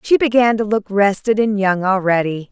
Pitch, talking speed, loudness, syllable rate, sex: 205 Hz, 190 wpm, -16 LUFS, 5.0 syllables/s, female